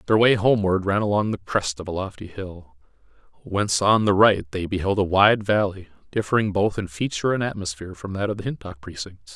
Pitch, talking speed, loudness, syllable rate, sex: 95 Hz, 205 wpm, -22 LUFS, 5.8 syllables/s, male